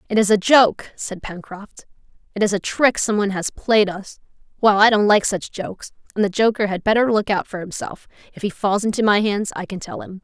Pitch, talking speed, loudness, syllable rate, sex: 205 Hz, 235 wpm, -19 LUFS, 5.4 syllables/s, female